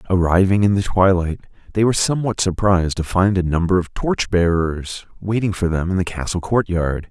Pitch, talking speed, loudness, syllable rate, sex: 95 Hz, 175 wpm, -19 LUFS, 5.4 syllables/s, male